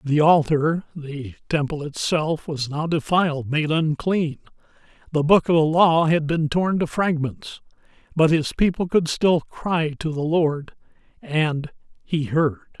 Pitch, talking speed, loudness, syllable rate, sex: 155 Hz, 140 wpm, -21 LUFS, 4.0 syllables/s, male